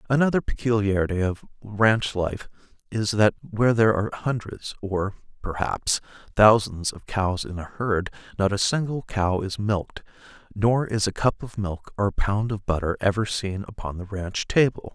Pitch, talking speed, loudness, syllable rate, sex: 105 Hz, 165 wpm, -24 LUFS, 4.7 syllables/s, male